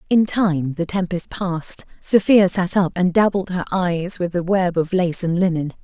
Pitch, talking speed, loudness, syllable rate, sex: 180 Hz, 195 wpm, -19 LUFS, 4.5 syllables/s, female